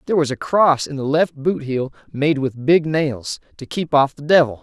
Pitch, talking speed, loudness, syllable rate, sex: 145 Hz, 235 wpm, -19 LUFS, 4.8 syllables/s, male